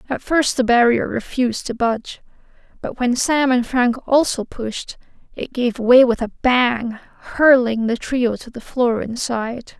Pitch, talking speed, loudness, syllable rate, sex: 245 Hz, 165 wpm, -18 LUFS, 4.1 syllables/s, female